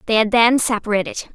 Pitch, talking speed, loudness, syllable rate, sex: 220 Hz, 180 wpm, -17 LUFS, 6.0 syllables/s, female